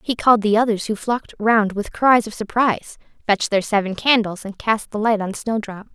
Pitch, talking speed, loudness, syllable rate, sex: 215 Hz, 210 wpm, -19 LUFS, 5.5 syllables/s, female